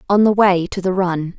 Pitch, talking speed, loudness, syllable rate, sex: 185 Hz, 260 wpm, -16 LUFS, 5.0 syllables/s, female